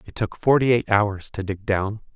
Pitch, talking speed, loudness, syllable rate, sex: 105 Hz, 220 wpm, -22 LUFS, 4.7 syllables/s, male